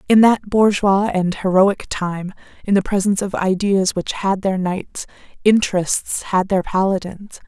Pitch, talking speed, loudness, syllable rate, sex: 195 Hz, 150 wpm, -18 LUFS, 4.3 syllables/s, female